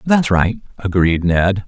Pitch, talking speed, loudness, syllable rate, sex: 100 Hz, 145 wpm, -16 LUFS, 3.7 syllables/s, male